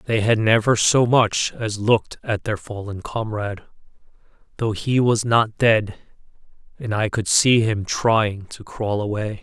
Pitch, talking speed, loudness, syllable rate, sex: 110 Hz, 160 wpm, -20 LUFS, 4.1 syllables/s, male